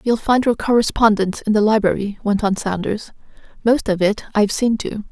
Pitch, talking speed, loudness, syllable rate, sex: 215 Hz, 190 wpm, -18 LUFS, 5.6 syllables/s, female